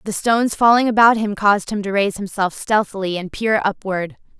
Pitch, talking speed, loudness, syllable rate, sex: 205 Hz, 190 wpm, -18 LUFS, 5.7 syllables/s, female